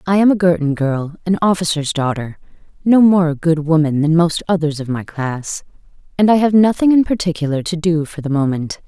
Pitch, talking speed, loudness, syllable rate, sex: 165 Hz, 205 wpm, -16 LUFS, 5.4 syllables/s, female